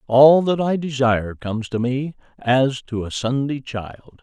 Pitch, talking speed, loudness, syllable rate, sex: 130 Hz, 170 wpm, -20 LUFS, 4.2 syllables/s, male